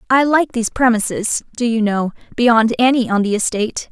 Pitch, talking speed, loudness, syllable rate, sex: 230 Hz, 185 wpm, -16 LUFS, 5.4 syllables/s, female